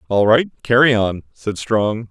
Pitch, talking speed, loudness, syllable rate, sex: 110 Hz, 170 wpm, -17 LUFS, 3.9 syllables/s, male